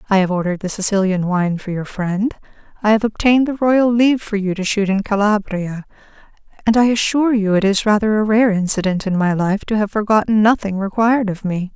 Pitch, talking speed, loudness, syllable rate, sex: 205 Hz, 210 wpm, -17 LUFS, 5.8 syllables/s, female